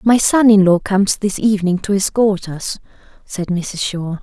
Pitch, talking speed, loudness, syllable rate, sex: 195 Hz, 185 wpm, -16 LUFS, 4.6 syllables/s, female